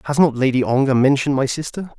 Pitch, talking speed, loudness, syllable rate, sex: 135 Hz, 210 wpm, -17 LUFS, 6.7 syllables/s, male